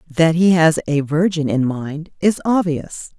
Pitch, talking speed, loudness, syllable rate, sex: 160 Hz, 170 wpm, -17 LUFS, 3.9 syllables/s, female